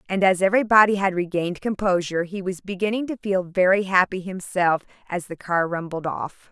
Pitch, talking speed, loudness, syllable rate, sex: 185 Hz, 175 wpm, -22 LUFS, 5.6 syllables/s, female